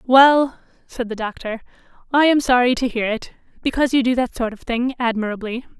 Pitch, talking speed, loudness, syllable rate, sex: 245 Hz, 185 wpm, -19 LUFS, 5.6 syllables/s, female